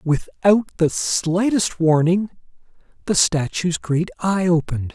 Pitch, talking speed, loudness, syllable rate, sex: 175 Hz, 110 wpm, -19 LUFS, 3.7 syllables/s, male